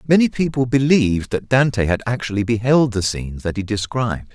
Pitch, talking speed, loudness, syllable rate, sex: 115 Hz, 180 wpm, -19 LUFS, 5.9 syllables/s, male